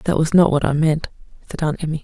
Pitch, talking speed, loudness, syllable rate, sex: 155 Hz, 265 wpm, -18 LUFS, 6.7 syllables/s, female